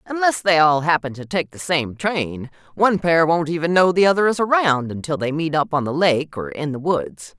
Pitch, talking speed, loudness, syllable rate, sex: 160 Hz, 235 wpm, -19 LUFS, 5.1 syllables/s, female